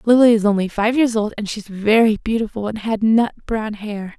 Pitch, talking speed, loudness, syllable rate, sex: 215 Hz, 230 wpm, -18 LUFS, 5.2 syllables/s, female